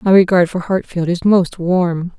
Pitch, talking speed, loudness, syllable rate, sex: 180 Hz, 190 wpm, -15 LUFS, 4.4 syllables/s, female